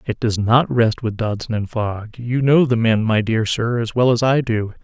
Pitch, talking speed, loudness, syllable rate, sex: 115 Hz, 250 wpm, -18 LUFS, 4.6 syllables/s, male